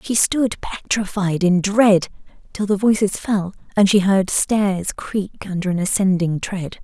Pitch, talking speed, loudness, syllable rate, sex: 195 Hz, 160 wpm, -19 LUFS, 4.1 syllables/s, female